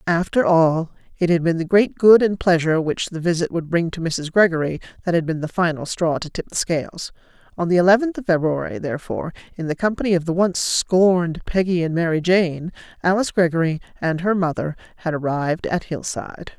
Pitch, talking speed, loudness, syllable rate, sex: 170 Hz, 195 wpm, -20 LUFS, 5.7 syllables/s, female